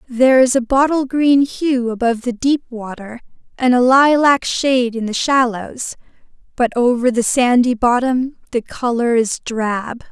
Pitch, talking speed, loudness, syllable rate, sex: 250 Hz, 155 wpm, -16 LUFS, 4.4 syllables/s, female